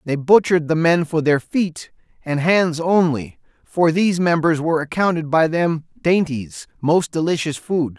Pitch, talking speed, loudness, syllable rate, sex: 165 Hz, 160 wpm, -18 LUFS, 4.3 syllables/s, male